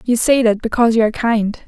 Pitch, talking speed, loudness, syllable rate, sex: 230 Hz, 250 wpm, -15 LUFS, 6.5 syllables/s, female